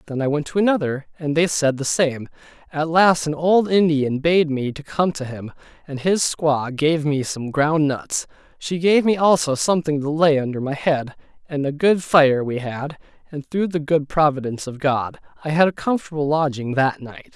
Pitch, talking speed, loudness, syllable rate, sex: 150 Hz, 205 wpm, -20 LUFS, 4.8 syllables/s, male